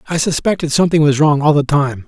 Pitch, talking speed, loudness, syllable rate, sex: 150 Hz, 230 wpm, -14 LUFS, 6.4 syllables/s, male